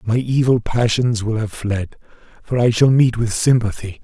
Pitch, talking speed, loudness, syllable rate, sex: 115 Hz, 180 wpm, -17 LUFS, 4.6 syllables/s, male